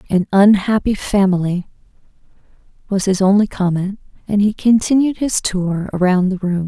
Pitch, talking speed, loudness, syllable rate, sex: 195 Hz, 135 wpm, -16 LUFS, 4.8 syllables/s, female